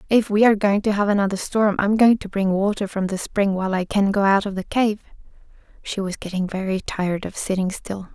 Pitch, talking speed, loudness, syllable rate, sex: 200 Hz, 245 wpm, -21 LUFS, 5.9 syllables/s, female